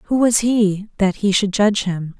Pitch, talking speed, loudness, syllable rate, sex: 205 Hz, 220 wpm, -17 LUFS, 4.8 syllables/s, female